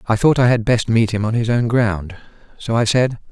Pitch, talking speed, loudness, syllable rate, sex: 115 Hz, 255 wpm, -17 LUFS, 5.2 syllables/s, male